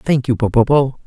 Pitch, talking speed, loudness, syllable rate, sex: 130 Hz, 170 wpm, -15 LUFS, 5.1 syllables/s, male